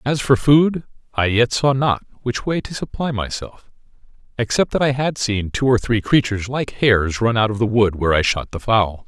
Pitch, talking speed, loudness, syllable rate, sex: 120 Hz, 220 wpm, -19 LUFS, 5.1 syllables/s, male